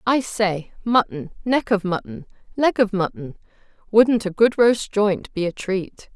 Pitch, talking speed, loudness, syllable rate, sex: 205 Hz, 145 wpm, -20 LUFS, 4.1 syllables/s, female